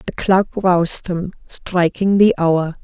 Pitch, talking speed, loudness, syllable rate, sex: 180 Hz, 150 wpm, -17 LUFS, 3.6 syllables/s, female